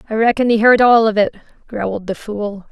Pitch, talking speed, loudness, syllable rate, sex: 220 Hz, 220 wpm, -15 LUFS, 5.6 syllables/s, female